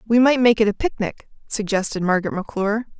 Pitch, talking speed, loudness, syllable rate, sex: 215 Hz, 180 wpm, -20 LUFS, 6.5 syllables/s, female